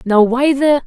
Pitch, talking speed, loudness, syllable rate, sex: 260 Hz, 210 wpm, -13 LUFS, 4.1 syllables/s, female